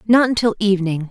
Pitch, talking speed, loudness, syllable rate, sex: 205 Hz, 165 wpm, -17 LUFS, 6.6 syllables/s, female